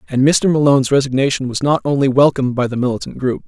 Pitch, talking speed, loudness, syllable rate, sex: 135 Hz, 205 wpm, -15 LUFS, 6.8 syllables/s, male